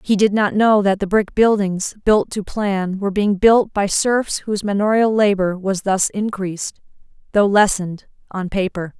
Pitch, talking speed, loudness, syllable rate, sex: 200 Hz, 175 wpm, -18 LUFS, 4.6 syllables/s, female